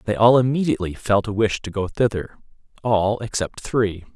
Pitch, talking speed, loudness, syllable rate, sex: 105 Hz, 175 wpm, -21 LUFS, 5.2 syllables/s, male